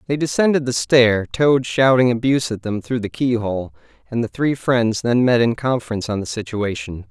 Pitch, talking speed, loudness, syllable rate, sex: 120 Hz, 195 wpm, -19 LUFS, 5.3 syllables/s, male